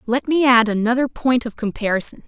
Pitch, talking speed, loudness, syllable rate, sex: 240 Hz, 185 wpm, -18 LUFS, 5.6 syllables/s, female